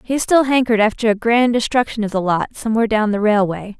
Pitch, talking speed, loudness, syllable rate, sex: 225 Hz, 220 wpm, -17 LUFS, 6.2 syllables/s, female